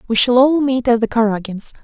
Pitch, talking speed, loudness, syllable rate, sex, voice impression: 240 Hz, 230 wpm, -15 LUFS, 5.8 syllables/s, female, very feminine, very adult-like, thin, tensed, slightly weak, bright, slightly soft, clear, fluent, slightly raspy, cute, intellectual, refreshing, sincere, calm, very friendly, reassuring, very unique, elegant, slightly wild, sweet, lively, kind, slightly intense, slightly sharp, slightly modest, light